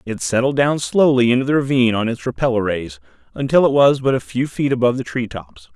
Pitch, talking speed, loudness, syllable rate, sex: 125 Hz, 230 wpm, -17 LUFS, 6.1 syllables/s, male